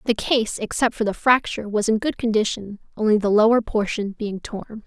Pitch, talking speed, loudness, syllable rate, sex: 220 Hz, 195 wpm, -21 LUFS, 5.3 syllables/s, female